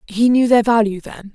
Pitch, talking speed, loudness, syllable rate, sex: 220 Hz, 225 wpm, -15 LUFS, 5.1 syllables/s, female